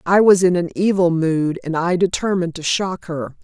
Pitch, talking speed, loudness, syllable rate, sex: 175 Hz, 210 wpm, -18 LUFS, 5.0 syllables/s, female